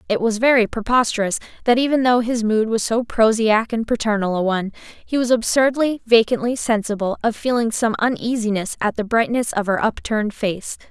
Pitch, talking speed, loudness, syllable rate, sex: 225 Hz, 175 wpm, -19 LUFS, 5.4 syllables/s, female